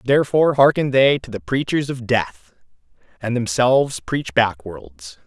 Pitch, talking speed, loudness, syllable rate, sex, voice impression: 120 Hz, 135 wpm, -18 LUFS, 4.5 syllables/s, male, very masculine, very adult-like, thick, tensed, powerful, bright, slightly soft, very clear, very fluent, cool, intellectual, very refreshing, sincere, slightly calm, very friendly, very reassuring, slightly unique, slightly elegant, wild, sweet, very lively, kind, slightly intense